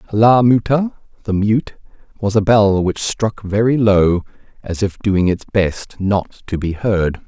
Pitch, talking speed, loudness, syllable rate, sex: 105 Hz, 165 wpm, -16 LUFS, 3.9 syllables/s, male